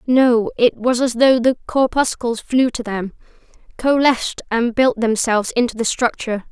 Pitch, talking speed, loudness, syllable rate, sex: 240 Hz, 145 wpm, -17 LUFS, 4.9 syllables/s, female